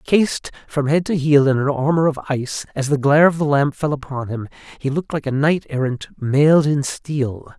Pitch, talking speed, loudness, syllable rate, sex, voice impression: 145 Hz, 220 wpm, -19 LUFS, 5.3 syllables/s, male, masculine, middle-aged, slightly tensed, powerful, slightly hard, muffled, slightly raspy, cool, intellectual, slightly mature, wild, lively, strict, sharp